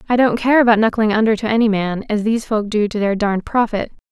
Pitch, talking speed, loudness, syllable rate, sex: 220 Hz, 250 wpm, -17 LUFS, 6.5 syllables/s, female